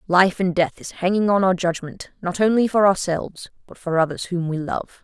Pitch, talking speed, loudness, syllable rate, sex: 180 Hz, 215 wpm, -21 LUFS, 5.2 syllables/s, female